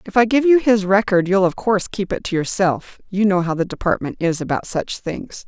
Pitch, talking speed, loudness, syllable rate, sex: 195 Hz, 240 wpm, -19 LUFS, 5.4 syllables/s, female